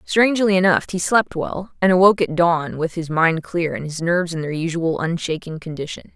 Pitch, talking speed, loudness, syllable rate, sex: 170 Hz, 205 wpm, -19 LUFS, 5.4 syllables/s, female